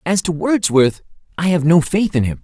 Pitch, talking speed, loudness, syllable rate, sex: 165 Hz, 220 wpm, -16 LUFS, 5.1 syllables/s, male